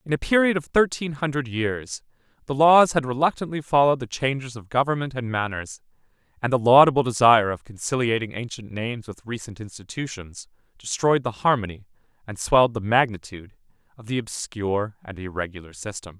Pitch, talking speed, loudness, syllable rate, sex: 120 Hz, 155 wpm, -22 LUFS, 5.8 syllables/s, male